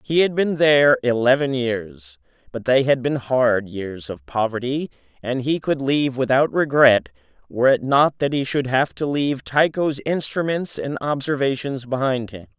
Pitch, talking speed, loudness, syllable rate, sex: 135 Hz, 165 wpm, -20 LUFS, 4.6 syllables/s, male